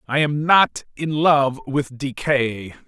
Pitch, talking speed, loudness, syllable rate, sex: 140 Hz, 145 wpm, -19 LUFS, 3.3 syllables/s, male